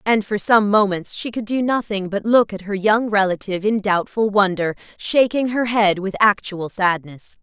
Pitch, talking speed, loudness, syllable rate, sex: 205 Hz, 185 wpm, -19 LUFS, 4.7 syllables/s, female